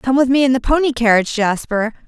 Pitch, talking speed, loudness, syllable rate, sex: 245 Hz, 230 wpm, -16 LUFS, 6.3 syllables/s, female